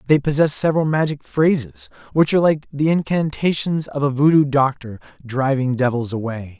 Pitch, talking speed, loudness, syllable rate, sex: 140 Hz, 155 wpm, -19 LUFS, 5.3 syllables/s, male